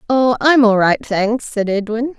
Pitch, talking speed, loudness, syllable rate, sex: 230 Hz, 190 wpm, -15 LUFS, 4.2 syllables/s, female